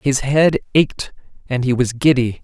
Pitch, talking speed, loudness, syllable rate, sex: 135 Hz, 175 wpm, -17 LUFS, 4.3 syllables/s, male